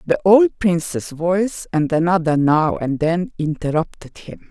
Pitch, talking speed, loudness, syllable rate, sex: 170 Hz, 145 wpm, -18 LUFS, 4.3 syllables/s, female